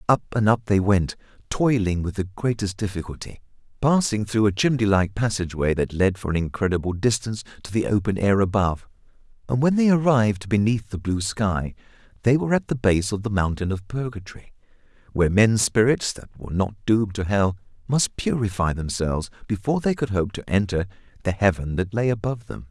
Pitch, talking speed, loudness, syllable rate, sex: 105 Hz, 180 wpm, -23 LUFS, 5.8 syllables/s, male